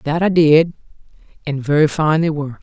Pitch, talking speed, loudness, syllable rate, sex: 150 Hz, 185 wpm, -16 LUFS, 5.4 syllables/s, female